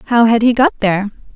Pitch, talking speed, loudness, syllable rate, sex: 225 Hz, 220 wpm, -13 LUFS, 5.9 syllables/s, female